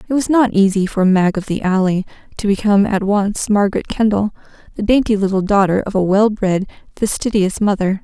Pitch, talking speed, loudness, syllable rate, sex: 200 Hz, 185 wpm, -16 LUFS, 5.6 syllables/s, female